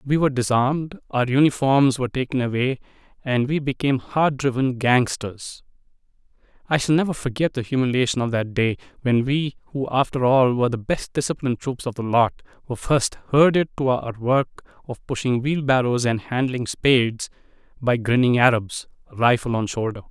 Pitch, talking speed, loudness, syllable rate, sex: 130 Hz, 160 wpm, -21 LUFS, 5.4 syllables/s, male